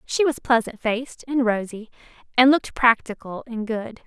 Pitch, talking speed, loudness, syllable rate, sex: 235 Hz, 160 wpm, -22 LUFS, 5.0 syllables/s, female